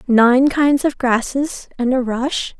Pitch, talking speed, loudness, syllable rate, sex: 260 Hz, 160 wpm, -17 LUFS, 3.4 syllables/s, female